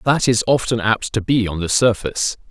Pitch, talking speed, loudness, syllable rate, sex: 110 Hz, 215 wpm, -18 LUFS, 5.3 syllables/s, male